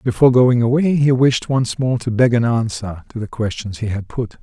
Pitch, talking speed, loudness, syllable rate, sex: 120 Hz, 230 wpm, -17 LUFS, 5.1 syllables/s, male